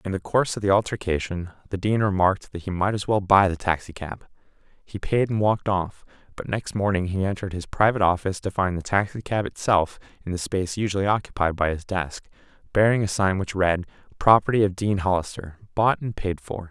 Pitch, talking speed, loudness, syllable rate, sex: 95 Hz, 200 wpm, -23 LUFS, 5.9 syllables/s, male